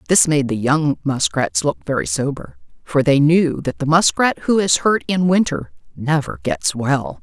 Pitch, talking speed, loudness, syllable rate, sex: 135 Hz, 185 wpm, -18 LUFS, 4.3 syllables/s, female